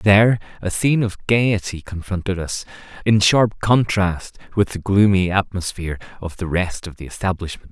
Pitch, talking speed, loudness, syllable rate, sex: 95 Hz, 155 wpm, -19 LUFS, 5.0 syllables/s, male